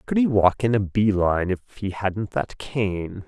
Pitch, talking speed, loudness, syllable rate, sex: 105 Hz, 200 wpm, -23 LUFS, 4.4 syllables/s, male